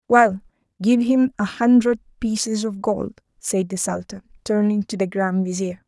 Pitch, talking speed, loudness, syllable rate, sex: 210 Hz, 165 wpm, -21 LUFS, 4.5 syllables/s, female